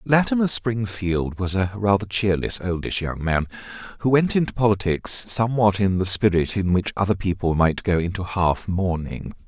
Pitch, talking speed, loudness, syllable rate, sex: 100 Hz, 165 wpm, -22 LUFS, 4.9 syllables/s, male